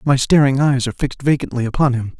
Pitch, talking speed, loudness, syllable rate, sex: 130 Hz, 220 wpm, -17 LUFS, 6.9 syllables/s, male